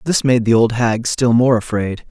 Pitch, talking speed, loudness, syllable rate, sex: 120 Hz, 230 wpm, -15 LUFS, 4.6 syllables/s, male